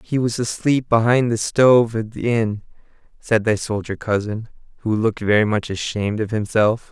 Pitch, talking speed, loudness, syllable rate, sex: 110 Hz, 175 wpm, -19 LUFS, 5.1 syllables/s, male